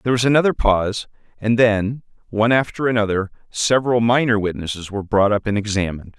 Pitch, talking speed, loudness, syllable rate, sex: 110 Hz, 165 wpm, -19 LUFS, 6.4 syllables/s, male